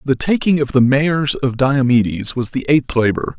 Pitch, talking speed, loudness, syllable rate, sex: 135 Hz, 195 wpm, -16 LUFS, 4.9 syllables/s, male